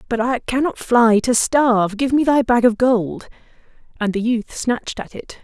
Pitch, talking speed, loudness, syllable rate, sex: 240 Hz, 200 wpm, -18 LUFS, 4.6 syllables/s, female